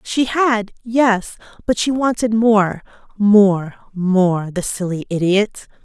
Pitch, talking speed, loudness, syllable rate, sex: 210 Hz, 125 wpm, -17 LUFS, 3.2 syllables/s, female